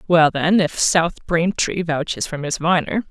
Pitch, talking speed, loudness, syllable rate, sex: 165 Hz, 175 wpm, -19 LUFS, 4.1 syllables/s, female